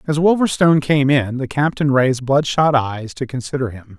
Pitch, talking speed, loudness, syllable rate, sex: 135 Hz, 180 wpm, -17 LUFS, 5.2 syllables/s, male